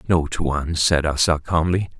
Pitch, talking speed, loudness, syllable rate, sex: 80 Hz, 150 wpm, -20 LUFS, 4.6 syllables/s, male